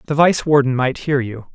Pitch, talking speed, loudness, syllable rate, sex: 140 Hz, 235 wpm, -17 LUFS, 5.1 syllables/s, male